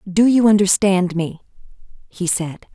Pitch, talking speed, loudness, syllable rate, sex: 190 Hz, 130 wpm, -17 LUFS, 4.2 syllables/s, female